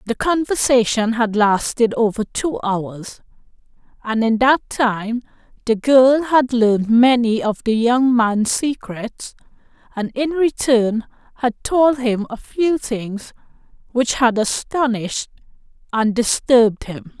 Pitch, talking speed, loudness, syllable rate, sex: 235 Hz, 125 wpm, -17 LUFS, 3.7 syllables/s, female